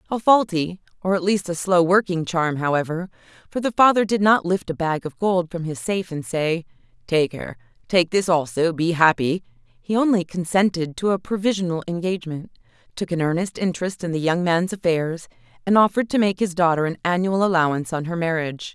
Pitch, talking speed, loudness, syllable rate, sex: 175 Hz, 185 wpm, -21 LUFS, 5.7 syllables/s, female